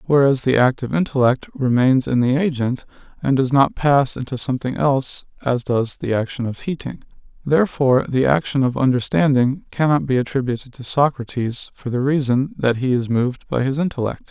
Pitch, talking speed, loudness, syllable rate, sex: 130 Hz, 175 wpm, -19 LUFS, 5.4 syllables/s, male